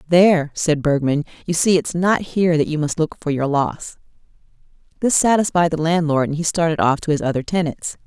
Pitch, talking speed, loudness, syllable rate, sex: 160 Hz, 200 wpm, -18 LUFS, 5.5 syllables/s, female